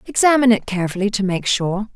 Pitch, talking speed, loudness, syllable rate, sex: 210 Hz, 185 wpm, -18 LUFS, 6.6 syllables/s, female